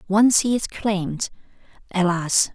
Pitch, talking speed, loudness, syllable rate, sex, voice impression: 195 Hz, 95 wpm, -21 LUFS, 4.1 syllables/s, female, feminine, middle-aged, slightly relaxed, hard, clear, slightly raspy, intellectual, elegant, lively, slightly sharp, modest